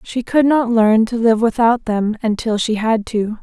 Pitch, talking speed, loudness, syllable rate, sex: 225 Hz, 210 wpm, -16 LUFS, 4.3 syllables/s, female